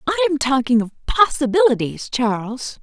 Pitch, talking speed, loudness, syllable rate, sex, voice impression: 275 Hz, 130 wpm, -18 LUFS, 5.4 syllables/s, female, very feminine, adult-like, slightly fluent, slightly calm, elegant, slightly sweet